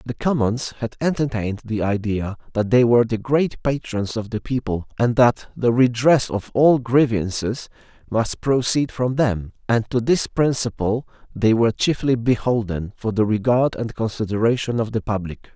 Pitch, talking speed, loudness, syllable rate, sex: 115 Hz, 160 wpm, -20 LUFS, 4.7 syllables/s, male